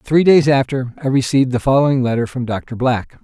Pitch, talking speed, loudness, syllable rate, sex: 130 Hz, 205 wpm, -16 LUFS, 5.4 syllables/s, male